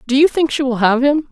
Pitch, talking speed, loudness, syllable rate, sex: 270 Hz, 320 wpm, -15 LUFS, 6.0 syllables/s, female